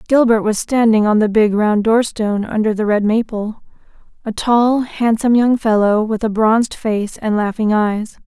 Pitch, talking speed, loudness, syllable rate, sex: 220 Hz, 175 wpm, -15 LUFS, 4.7 syllables/s, female